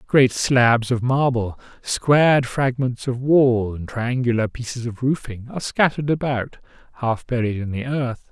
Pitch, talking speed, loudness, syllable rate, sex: 125 Hz, 150 wpm, -20 LUFS, 4.4 syllables/s, male